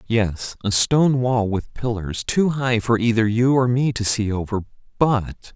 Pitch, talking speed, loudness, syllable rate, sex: 115 Hz, 185 wpm, -20 LUFS, 4.2 syllables/s, male